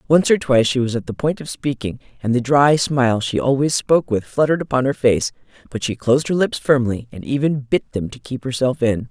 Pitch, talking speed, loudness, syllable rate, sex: 130 Hz, 235 wpm, -19 LUFS, 5.8 syllables/s, female